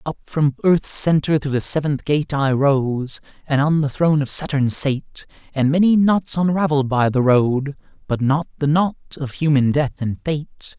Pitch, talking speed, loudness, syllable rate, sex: 145 Hz, 185 wpm, -19 LUFS, 4.5 syllables/s, male